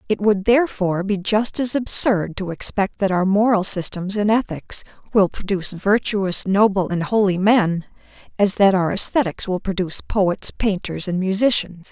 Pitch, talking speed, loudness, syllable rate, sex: 195 Hz, 160 wpm, -19 LUFS, 4.8 syllables/s, female